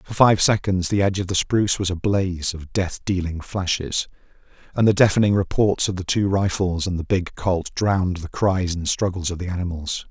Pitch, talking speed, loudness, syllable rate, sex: 95 Hz, 210 wpm, -21 LUFS, 5.3 syllables/s, male